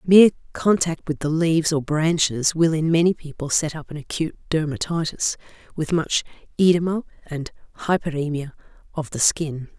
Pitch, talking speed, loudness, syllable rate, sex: 160 Hz, 145 wpm, -22 LUFS, 5.3 syllables/s, female